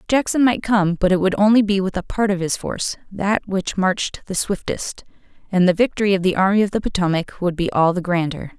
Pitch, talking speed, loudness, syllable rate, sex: 190 Hz, 230 wpm, -19 LUFS, 5.8 syllables/s, female